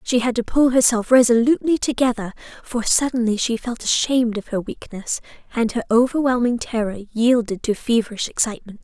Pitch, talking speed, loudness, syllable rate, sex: 235 Hz, 155 wpm, -19 LUFS, 5.7 syllables/s, female